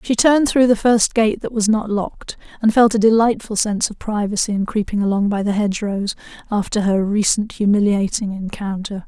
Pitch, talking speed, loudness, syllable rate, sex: 210 Hz, 185 wpm, -18 LUFS, 5.5 syllables/s, female